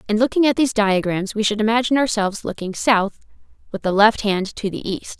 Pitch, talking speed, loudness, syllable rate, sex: 215 Hz, 210 wpm, -19 LUFS, 6.0 syllables/s, female